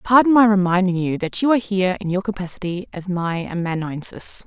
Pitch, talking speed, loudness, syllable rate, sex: 190 Hz, 190 wpm, -20 LUFS, 5.8 syllables/s, female